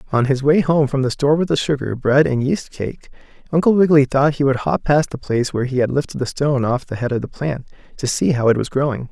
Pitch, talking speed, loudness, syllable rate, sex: 140 Hz, 270 wpm, -18 LUFS, 6.3 syllables/s, male